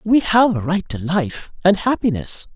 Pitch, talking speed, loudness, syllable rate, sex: 180 Hz, 165 wpm, -18 LUFS, 4.4 syllables/s, male